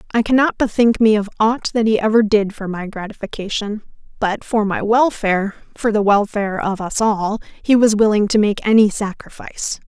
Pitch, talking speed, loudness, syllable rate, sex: 210 Hz, 170 wpm, -17 LUFS, 5.3 syllables/s, female